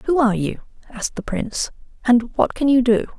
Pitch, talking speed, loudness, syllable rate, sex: 235 Hz, 205 wpm, -20 LUFS, 5.8 syllables/s, female